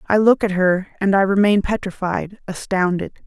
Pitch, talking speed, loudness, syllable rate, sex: 195 Hz, 165 wpm, -18 LUFS, 5.1 syllables/s, female